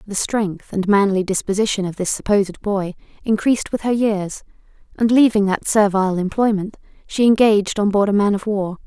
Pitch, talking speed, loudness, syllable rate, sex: 205 Hz, 175 wpm, -18 LUFS, 5.4 syllables/s, female